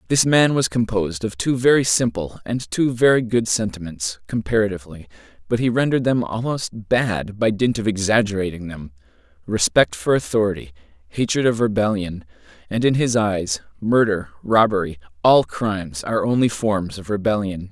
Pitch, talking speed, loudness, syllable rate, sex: 105 Hz, 145 wpm, -20 LUFS, 5.2 syllables/s, male